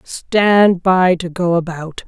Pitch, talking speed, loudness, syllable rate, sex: 180 Hz, 145 wpm, -14 LUFS, 3.1 syllables/s, female